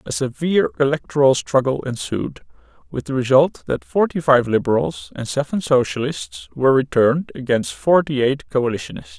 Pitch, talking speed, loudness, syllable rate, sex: 125 Hz, 135 wpm, -19 LUFS, 5.4 syllables/s, male